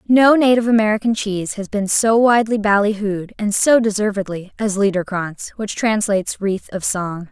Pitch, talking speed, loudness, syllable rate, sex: 210 Hz, 155 wpm, -17 LUFS, 5.2 syllables/s, female